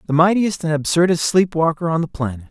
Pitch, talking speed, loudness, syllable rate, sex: 165 Hz, 215 wpm, -18 LUFS, 6.0 syllables/s, male